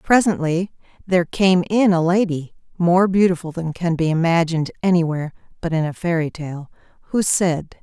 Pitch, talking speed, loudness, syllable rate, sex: 175 Hz, 155 wpm, -19 LUFS, 5.3 syllables/s, female